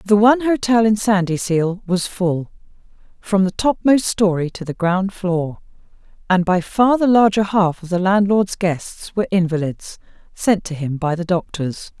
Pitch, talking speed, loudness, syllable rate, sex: 190 Hz, 165 wpm, -18 LUFS, 4.4 syllables/s, female